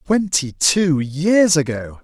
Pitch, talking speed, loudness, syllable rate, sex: 160 Hz, 120 wpm, -17 LUFS, 3.2 syllables/s, male